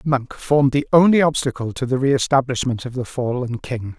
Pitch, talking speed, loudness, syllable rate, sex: 130 Hz, 195 wpm, -19 LUFS, 5.5 syllables/s, male